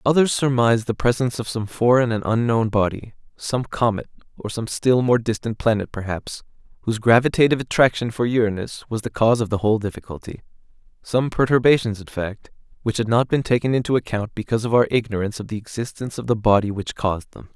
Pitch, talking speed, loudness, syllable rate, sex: 115 Hz, 185 wpm, -21 LUFS, 6.3 syllables/s, male